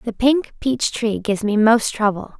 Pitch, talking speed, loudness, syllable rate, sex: 225 Hz, 200 wpm, -19 LUFS, 4.6 syllables/s, female